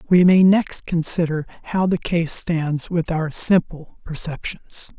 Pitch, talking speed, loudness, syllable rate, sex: 165 Hz, 145 wpm, -19 LUFS, 3.9 syllables/s, male